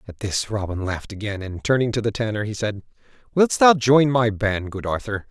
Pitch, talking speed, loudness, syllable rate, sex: 110 Hz, 215 wpm, -21 LUFS, 5.4 syllables/s, male